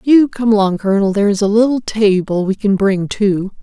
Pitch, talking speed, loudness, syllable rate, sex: 205 Hz, 180 wpm, -14 LUFS, 5.2 syllables/s, female